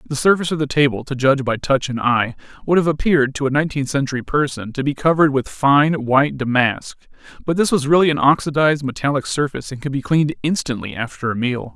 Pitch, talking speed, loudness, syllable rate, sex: 140 Hz, 215 wpm, -18 LUFS, 6.4 syllables/s, male